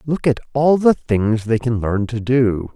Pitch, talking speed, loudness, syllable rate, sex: 120 Hz, 220 wpm, -18 LUFS, 4.1 syllables/s, male